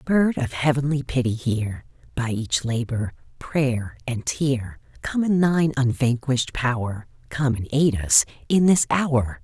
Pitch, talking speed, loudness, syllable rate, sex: 130 Hz, 145 wpm, -22 LUFS, 4.2 syllables/s, female